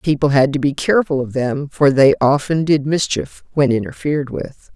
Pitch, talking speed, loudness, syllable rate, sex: 145 Hz, 190 wpm, -17 LUFS, 5.1 syllables/s, female